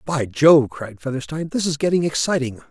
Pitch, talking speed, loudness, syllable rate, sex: 145 Hz, 180 wpm, -19 LUFS, 5.5 syllables/s, male